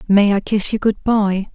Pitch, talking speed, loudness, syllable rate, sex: 205 Hz, 235 wpm, -17 LUFS, 4.4 syllables/s, female